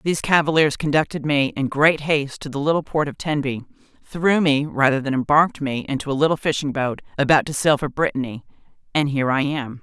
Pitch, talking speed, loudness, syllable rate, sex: 145 Hz, 200 wpm, -20 LUFS, 5.9 syllables/s, female